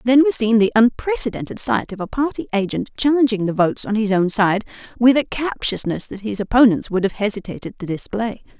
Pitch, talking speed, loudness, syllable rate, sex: 220 Hz, 195 wpm, -19 LUFS, 5.8 syllables/s, female